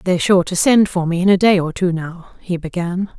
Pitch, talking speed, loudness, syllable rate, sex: 180 Hz, 265 wpm, -16 LUFS, 5.5 syllables/s, female